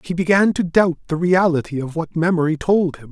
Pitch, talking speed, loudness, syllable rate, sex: 170 Hz, 210 wpm, -18 LUFS, 5.6 syllables/s, male